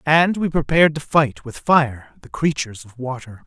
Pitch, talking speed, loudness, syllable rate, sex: 140 Hz, 190 wpm, -19 LUFS, 4.9 syllables/s, male